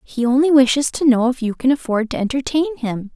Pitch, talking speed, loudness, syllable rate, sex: 260 Hz, 230 wpm, -17 LUFS, 5.8 syllables/s, female